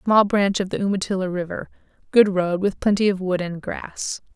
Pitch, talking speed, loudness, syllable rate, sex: 190 Hz, 180 wpm, -22 LUFS, 5.1 syllables/s, female